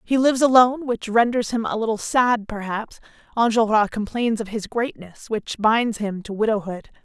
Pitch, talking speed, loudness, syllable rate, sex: 225 Hz, 170 wpm, -21 LUFS, 5.0 syllables/s, female